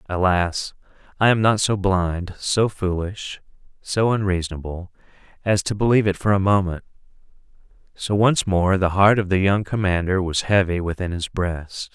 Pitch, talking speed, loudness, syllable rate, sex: 95 Hz, 155 wpm, -20 LUFS, 4.8 syllables/s, male